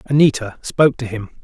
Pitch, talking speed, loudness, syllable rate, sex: 125 Hz, 170 wpm, -18 LUFS, 5.9 syllables/s, male